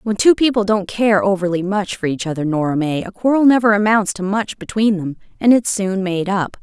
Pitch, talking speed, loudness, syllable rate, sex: 200 Hz, 225 wpm, -17 LUFS, 5.4 syllables/s, female